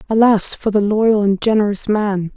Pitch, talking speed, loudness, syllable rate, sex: 210 Hz, 180 wpm, -16 LUFS, 4.7 syllables/s, female